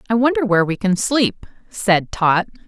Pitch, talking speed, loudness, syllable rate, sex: 210 Hz, 180 wpm, -18 LUFS, 4.8 syllables/s, female